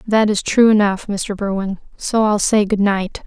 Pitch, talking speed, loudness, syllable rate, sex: 205 Hz, 200 wpm, -17 LUFS, 4.4 syllables/s, female